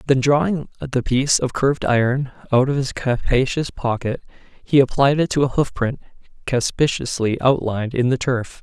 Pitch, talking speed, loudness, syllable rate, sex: 130 Hz, 165 wpm, -19 LUFS, 5.0 syllables/s, male